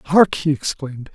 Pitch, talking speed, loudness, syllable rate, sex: 145 Hz, 155 wpm, -19 LUFS, 5.0 syllables/s, male